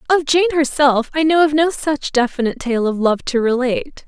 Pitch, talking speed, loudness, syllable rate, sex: 275 Hz, 205 wpm, -17 LUFS, 5.4 syllables/s, female